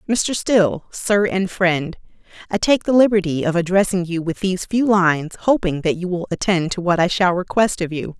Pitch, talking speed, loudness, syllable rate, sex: 185 Hz, 190 wpm, -18 LUFS, 5.0 syllables/s, female